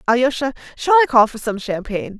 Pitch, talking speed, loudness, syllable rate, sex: 245 Hz, 190 wpm, -18 LUFS, 6.2 syllables/s, female